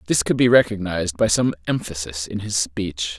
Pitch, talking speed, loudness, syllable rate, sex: 95 Hz, 190 wpm, -21 LUFS, 5.2 syllables/s, male